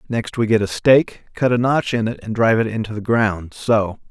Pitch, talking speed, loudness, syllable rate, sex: 110 Hz, 235 wpm, -18 LUFS, 5.3 syllables/s, male